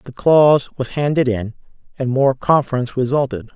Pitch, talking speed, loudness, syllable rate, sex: 130 Hz, 150 wpm, -17 LUFS, 5.4 syllables/s, male